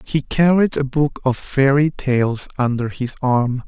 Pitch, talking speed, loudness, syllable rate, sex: 135 Hz, 165 wpm, -18 LUFS, 3.9 syllables/s, male